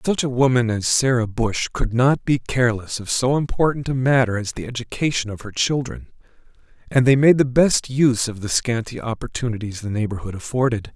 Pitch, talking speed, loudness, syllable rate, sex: 120 Hz, 185 wpm, -20 LUFS, 5.6 syllables/s, male